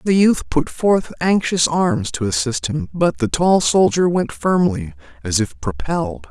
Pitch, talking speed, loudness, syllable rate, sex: 140 Hz, 170 wpm, -18 LUFS, 4.2 syllables/s, male